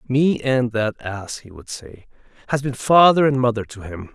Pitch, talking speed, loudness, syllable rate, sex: 125 Hz, 205 wpm, -19 LUFS, 4.6 syllables/s, male